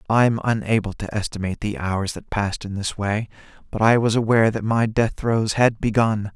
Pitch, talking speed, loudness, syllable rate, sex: 110 Hz, 200 wpm, -21 LUFS, 5.3 syllables/s, male